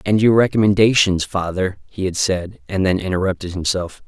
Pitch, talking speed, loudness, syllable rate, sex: 95 Hz, 160 wpm, -18 LUFS, 5.3 syllables/s, male